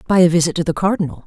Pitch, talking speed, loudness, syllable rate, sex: 170 Hz, 285 wpm, -16 LUFS, 8.2 syllables/s, female